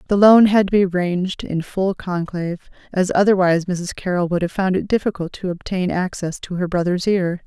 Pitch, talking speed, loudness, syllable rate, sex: 185 Hz, 200 wpm, -19 LUFS, 5.5 syllables/s, female